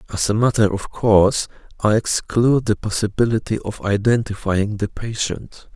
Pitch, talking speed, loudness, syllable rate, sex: 105 Hz, 135 wpm, -19 LUFS, 5.0 syllables/s, male